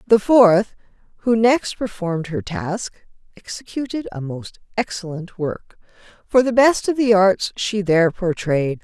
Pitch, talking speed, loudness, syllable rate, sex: 200 Hz, 145 wpm, -19 LUFS, 4.2 syllables/s, female